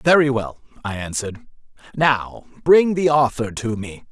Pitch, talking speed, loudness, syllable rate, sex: 130 Hz, 145 wpm, -19 LUFS, 4.6 syllables/s, male